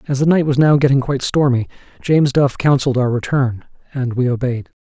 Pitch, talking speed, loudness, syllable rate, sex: 135 Hz, 200 wpm, -16 LUFS, 6.0 syllables/s, male